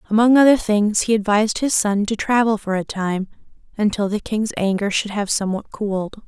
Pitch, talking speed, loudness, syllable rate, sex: 210 Hz, 190 wpm, -19 LUFS, 5.4 syllables/s, female